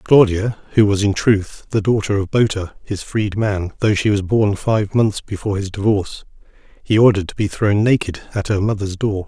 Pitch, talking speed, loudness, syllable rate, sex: 100 Hz, 195 wpm, -18 LUFS, 5.1 syllables/s, male